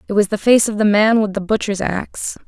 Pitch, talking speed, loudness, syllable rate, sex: 210 Hz, 265 wpm, -16 LUFS, 5.8 syllables/s, female